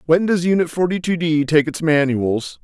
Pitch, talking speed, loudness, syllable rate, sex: 160 Hz, 205 wpm, -18 LUFS, 4.8 syllables/s, male